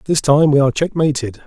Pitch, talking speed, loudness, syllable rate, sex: 140 Hz, 205 wpm, -15 LUFS, 6.3 syllables/s, male